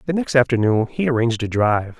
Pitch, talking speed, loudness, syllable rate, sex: 125 Hz, 210 wpm, -19 LUFS, 6.6 syllables/s, male